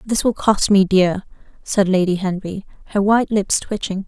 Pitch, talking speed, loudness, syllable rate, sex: 195 Hz, 175 wpm, -18 LUFS, 4.8 syllables/s, female